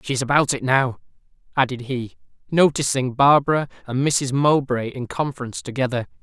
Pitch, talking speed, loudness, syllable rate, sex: 130 Hz, 145 wpm, -21 LUFS, 5.5 syllables/s, male